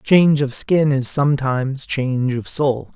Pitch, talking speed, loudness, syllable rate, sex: 135 Hz, 160 wpm, -18 LUFS, 4.5 syllables/s, male